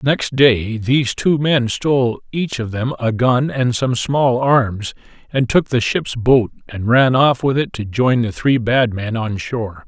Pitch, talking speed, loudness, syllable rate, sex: 125 Hz, 205 wpm, -17 LUFS, 4.1 syllables/s, male